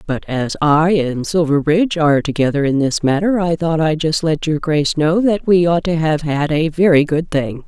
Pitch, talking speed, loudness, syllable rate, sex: 160 Hz, 220 wpm, -16 LUFS, 5.0 syllables/s, female